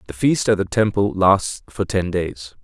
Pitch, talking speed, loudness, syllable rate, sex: 95 Hz, 205 wpm, -19 LUFS, 4.3 syllables/s, male